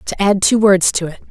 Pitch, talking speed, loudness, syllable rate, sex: 195 Hz, 275 wpm, -14 LUFS, 5.3 syllables/s, female